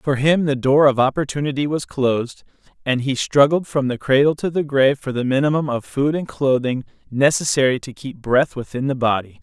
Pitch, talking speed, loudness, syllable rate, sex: 135 Hz, 195 wpm, -19 LUFS, 5.4 syllables/s, male